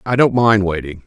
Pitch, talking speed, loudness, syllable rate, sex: 105 Hz, 225 wpm, -15 LUFS, 5.3 syllables/s, male